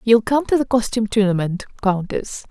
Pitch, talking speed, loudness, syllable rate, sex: 220 Hz, 170 wpm, -19 LUFS, 5.5 syllables/s, female